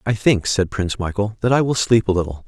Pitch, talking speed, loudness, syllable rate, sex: 105 Hz, 265 wpm, -19 LUFS, 6.1 syllables/s, male